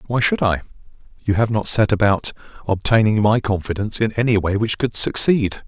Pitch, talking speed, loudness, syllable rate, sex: 105 Hz, 180 wpm, -18 LUFS, 5.5 syllables/s, male